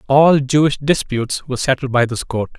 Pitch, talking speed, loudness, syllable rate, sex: 135 Hz, 185 wpm, -16 LUFS, 5.5 syllables/s, male